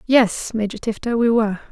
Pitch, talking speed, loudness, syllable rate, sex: 225 Hz, 175 wpm, -20 LUFS, 5.5 syllables/s, female